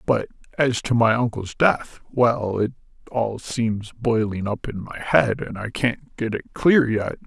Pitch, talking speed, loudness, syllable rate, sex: 115 Hz, 175 wpm, -22 LUFS, 3.8 syllables/s, male